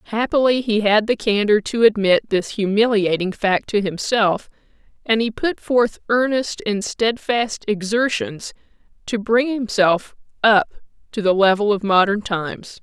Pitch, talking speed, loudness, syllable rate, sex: 215 Hz, 140 wpm, -19 LUFS, 4.3 syllables/s, female